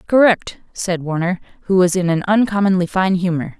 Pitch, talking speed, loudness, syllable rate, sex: 185 Hz, 165 wpm, -17 LUFS, 5.3 syllables/s, female